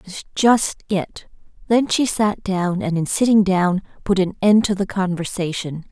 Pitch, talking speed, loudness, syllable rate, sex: 195 Hz, 185 wpm, -19 LUFS, 4.4 syllables/s, female